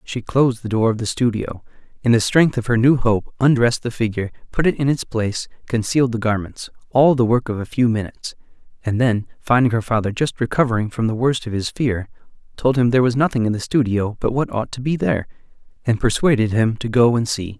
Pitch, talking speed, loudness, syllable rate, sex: 120 Hz, 220 wpm, -19 LUFS, 6.0 syllables/s, male